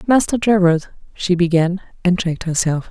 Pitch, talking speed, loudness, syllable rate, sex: 180 Hz, 125 wpm, -17 LUFS, 5.2 syllables/s, female